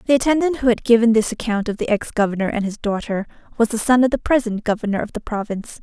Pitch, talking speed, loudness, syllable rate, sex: 225 Hz, 245 wpm, -19 LUFS, 6.7 syllables/s, female